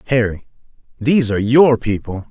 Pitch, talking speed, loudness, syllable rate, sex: 120 Hz, 130 wpm, -16 LUFS, 5.8 syllables/s, male